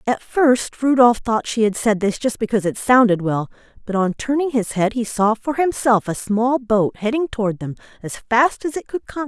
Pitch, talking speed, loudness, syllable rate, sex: 230 Hz, 220 wpm, -19 LUFS, 4.9 syllables/s, female